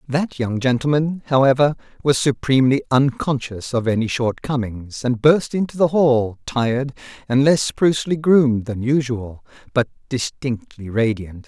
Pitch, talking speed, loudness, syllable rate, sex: 130 Hz, 130 wpm, -19 LUFS, 4.6 syllables/s, male